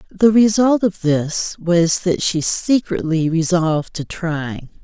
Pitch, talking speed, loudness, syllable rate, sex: 175 Hz, 135 wpm, -17 LUFS, 3.7 syllables/s, female